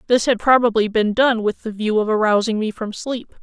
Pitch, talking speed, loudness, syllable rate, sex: 225 Hz, 230 wpm, -18 LUFS, 5.3 syllables/s, female